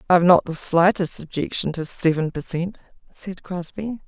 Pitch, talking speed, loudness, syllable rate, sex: 175 Hz, 160 wpm, -21 LUFS, 4.9 syllables/s, female